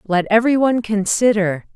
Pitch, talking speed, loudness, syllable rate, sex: 210 Hz, 105 wpm, -17 LUFS, 5.0 syllables/s, female